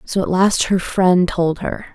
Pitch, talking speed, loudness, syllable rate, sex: 185 Hz, 215 wpm, -17 LUFS, 3.9 syllables/s, female